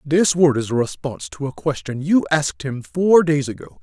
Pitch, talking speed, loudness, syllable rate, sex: 145 Hz, 220 wpm, -19 LUFS, 5.2 syllables/s, male